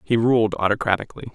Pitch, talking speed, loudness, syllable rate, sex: 110 Hz, 135 wpm, -20 LUFS, 6.8 syllables/s, male